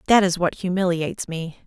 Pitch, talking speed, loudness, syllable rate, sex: 180 Hz, 180 wpm, -22 LUFS, 5.6 syllables/s, female